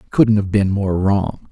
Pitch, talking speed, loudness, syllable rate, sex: 100 Hz, 240 wpm, -17 LUFS, 5.1 syllables/s, male